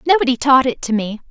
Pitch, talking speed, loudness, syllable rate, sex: 265 Hz, 230 wpm, -16 LUFS, 6.3 syllables/s, female